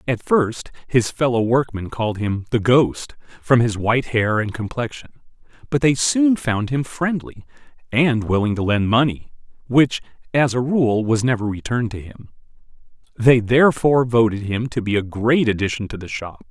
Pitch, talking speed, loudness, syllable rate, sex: 120 Hz, 170 wpm, -19 LUFS, 4.9 syllables/s, male